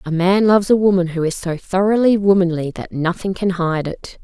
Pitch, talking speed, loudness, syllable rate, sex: 185 Hz, 215 wpm, -17 LUFS, 5.3 syllables/s, female